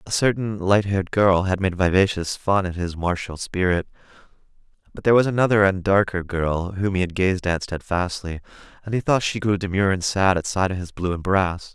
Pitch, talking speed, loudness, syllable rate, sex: 95 Hz, 210 wpm, -21 LUFS, 5.4 syllables/s, male